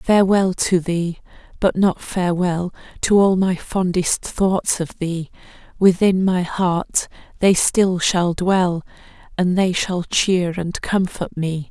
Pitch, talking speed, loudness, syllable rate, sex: 180 Hz, 140 wpm, -19 LUFS, 3.5 syllables/s, female